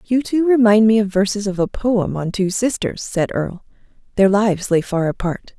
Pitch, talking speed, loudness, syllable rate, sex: 205 Hz, 205 wpm, -18 LUFS, 5.0 syllables/s, female